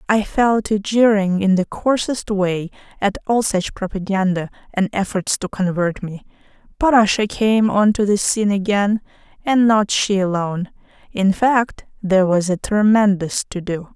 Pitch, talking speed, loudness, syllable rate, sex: 200 Hz, 155 wpm, -18 LUFS, 4.5 syllables/s, female